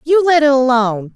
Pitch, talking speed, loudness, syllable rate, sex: 270 Hz, 205 wpm, -13 LUFS, 5.7 syllables/s, female